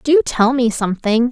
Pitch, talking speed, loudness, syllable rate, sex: 230 Hz, 180 wpm, -16 LUFS, 4.9 syllables/s, female